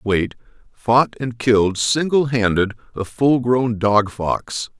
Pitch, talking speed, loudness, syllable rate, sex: 115 Hz, 140 wpm, -18 LUFS, 3.4 syllables/s, male